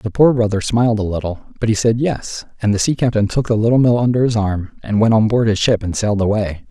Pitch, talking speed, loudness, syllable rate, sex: 110 Hz, 270 wpm, -16 LUFS, 6.2 syllables/s, male